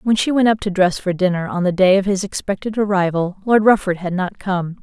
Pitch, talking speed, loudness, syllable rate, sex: 195 Hz, 250 wpm, -18 LUFS, 5.6 syllables/s, female